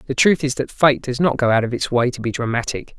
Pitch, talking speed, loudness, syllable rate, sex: 130 Hz, 300 wpm, -19 LUFS, 6.1 syllables/s, male